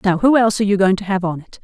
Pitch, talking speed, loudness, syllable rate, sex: 195 Hz, 365 wpm, -16 LUFS, 7.8 syllables/s, female